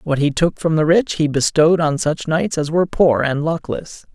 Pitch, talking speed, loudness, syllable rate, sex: 160 Hz, 230 wpm, -17 LUFS, 5.0 syllables/s, male